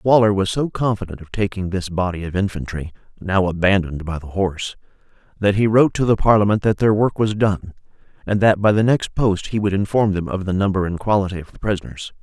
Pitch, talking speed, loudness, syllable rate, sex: 100 Hz, 215 wpm, -19 LUFS, 6.0 syllables/s, male